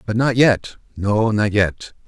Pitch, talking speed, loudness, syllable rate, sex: 110 Hz, 145 wpm, -18 LUFS, 3.6 syllables/s, male